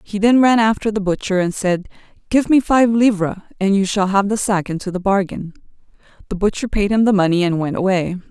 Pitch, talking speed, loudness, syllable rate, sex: 200 Hz, 215 wpm, -17 LUFS, 5.8 syllables/s, female